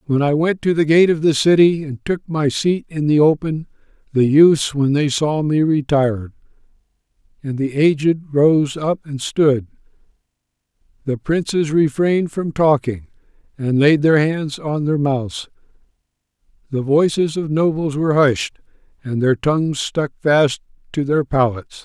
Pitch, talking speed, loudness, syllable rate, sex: 150 Hz, 155 wpm, -17 LUFS, 4.4 syllables/s, male